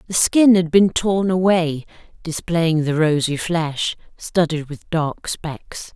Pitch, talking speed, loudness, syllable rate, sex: 165 Hz, 140 wpm, -19 LUFS, 3.5 syllables/s, female